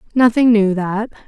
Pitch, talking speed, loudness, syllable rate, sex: 215 Hz, 140 wpm, -15 LUFS, 4.7 syllables/s, female